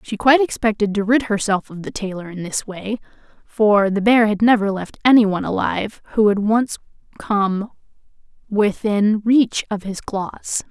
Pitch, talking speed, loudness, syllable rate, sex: 210 Hz, 160 wpm, -18 LUFS, 4.6 syllables/s, female